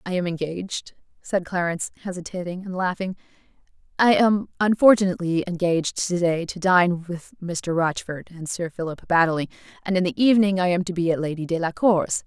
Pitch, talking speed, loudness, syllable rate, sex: 175 Hz, 160 wpm, -22 LUFS, 5.6 syllables/s, female